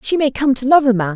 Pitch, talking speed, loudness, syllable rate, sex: 255 Hz, 365 wpm, -15 LUFS, 6.4 syllables/s, female